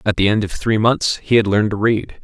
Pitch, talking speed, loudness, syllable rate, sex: 110 Hz, 295 wpm, -17 LUFS, 5.7 syllables/s, male